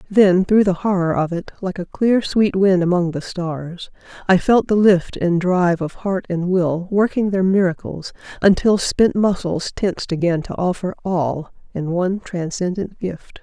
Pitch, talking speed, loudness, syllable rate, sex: 185 Hz, 175 wpm, -18 LUFS, 4.4 syllables/s, female